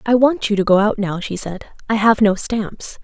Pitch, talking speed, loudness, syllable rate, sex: 210 Hz, 255 wpm, -17 LUFS, 4.7 syllables/s, female